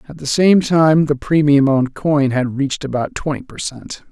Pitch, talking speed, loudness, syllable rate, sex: 145 Hz, 205 wpm, -16 LUFS, 4.6 syllables/s, male